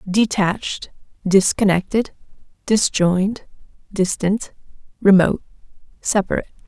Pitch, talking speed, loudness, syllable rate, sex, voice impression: 200 Hz, 55 wpm, -19 LUFS, 4.7 syllables/s, female, feminine, adult-like, slightly relaxed, powerful, slightly dark, clear, slightly halting, intellectual, calm, slightly friendly, elegant, lively